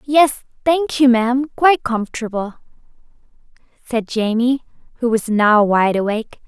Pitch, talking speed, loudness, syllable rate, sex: 240 Hz, 120 wpm, -17 LUFS, 4.8 syllables/s, female